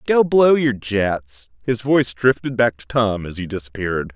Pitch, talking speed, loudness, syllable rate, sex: 115 Hz, 190 wpm, -19 LUFS, 4.6 syllables/s, male